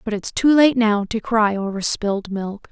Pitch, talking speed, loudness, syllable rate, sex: 215 Hz, 220 wpm, -19 LUFS, 4.2 syllables/s, female